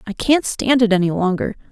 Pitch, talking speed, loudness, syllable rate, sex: 215 Hz, 210 wpm, -17 LUFS, 5.5 syllables/s, female